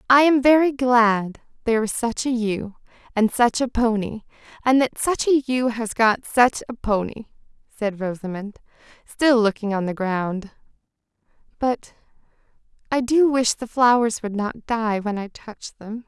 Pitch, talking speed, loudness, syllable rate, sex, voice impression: 230 Hz, 160 wpm, -21 LUFS, 4.3 syllables/s, female, very feminine, slightly young, slightly adult-like, very thin, tensed, slightly weak, bright, soft, very clear, fluent, very cute, slightly cool, intellectual, refreshing, sincere, calm, very friendly, very reassuring, unique, very elegant, slightly wild, very sweet, slightly lively, very kind, slightly intense, slightly sharp, slightly modest, light